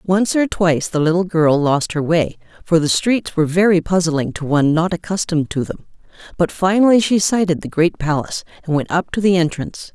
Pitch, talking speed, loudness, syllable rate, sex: 170 Hz, 205 wpm, -17 LUFS, 5.6 syllables/s, female